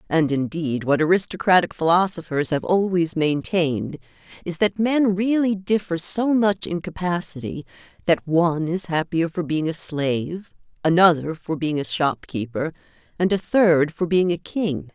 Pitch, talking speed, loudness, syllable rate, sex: 170 Hz, 150 wpm, -21 LUFS, 4.6 syllables/s, female